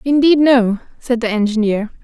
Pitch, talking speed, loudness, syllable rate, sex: 240 Hz, 150 wpm, -15 LUFS, 4.8 syllables/s, female